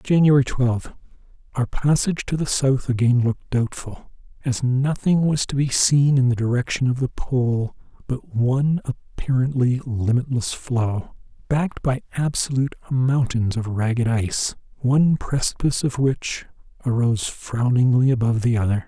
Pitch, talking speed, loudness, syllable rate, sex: 125 Hz, 135 wpm, -21 LUFS, 4.8 syllables/s, male